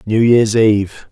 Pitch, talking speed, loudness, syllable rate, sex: 110 Hz, 160 wpm, -13 LUFS, 4.0 syllables/s, male